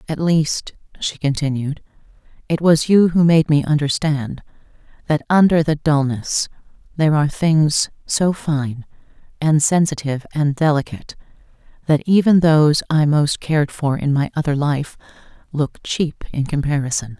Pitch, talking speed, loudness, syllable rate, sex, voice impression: 150 Hz, 135 wpm, -18 LUFS, 4.7 syllables/s, female, very feminine, very adult-like, intellectual, slightly sweet